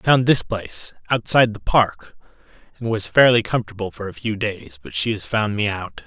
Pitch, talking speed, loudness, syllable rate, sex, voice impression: 105 Hz, 210 wpm, -20 LUFS, 5.4 syllables/s, male, very masculine, slightly middle-aged, thick, very tensed, powerful, very bright, slightly soft, very clear, very fluent, raspy, cool, intellectual, very refreshing, sincere, slightly calm, very friendly, very reassuring, very unique, slightly elegant, wild, sweet, very lively, kind, intense